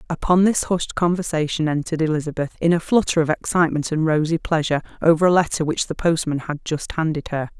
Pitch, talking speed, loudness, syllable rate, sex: 160 Hz, 190 wpm, -20 LUFS, 6.2 syllables/s, female